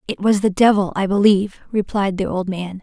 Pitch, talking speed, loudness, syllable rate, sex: 195 Hz, 215 wpm, -18 LUFS, 5.5 syllables/s, female